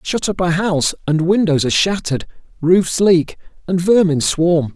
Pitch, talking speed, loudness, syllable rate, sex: 170 Hz, 165 wpm, -16 LUFS, 4.9 syllables/s, male